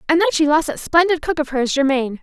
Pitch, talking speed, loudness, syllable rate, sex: 305 Hz, 270 wpm, -17 LUFS, 6.5 syllables/s, female